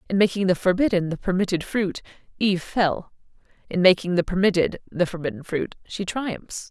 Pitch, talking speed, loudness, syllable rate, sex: 185 Hz, 160 wpm, -23 LUFS, 5.4 syllables/s, female